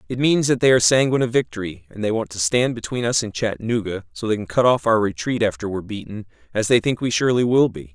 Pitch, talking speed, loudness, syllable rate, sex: 110 Hz, 255 wpm, -20 LUFS, 6.6 syllables/s, male